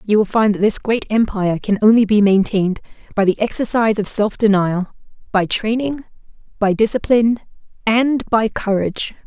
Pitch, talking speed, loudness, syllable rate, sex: 215 Hz, 155 wpm, -17 LUFS, 5.5 syllables/s, female